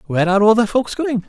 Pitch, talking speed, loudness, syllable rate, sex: 215 Hz, 280 wpm, -16 LUFS, 7.2 syllables/s, male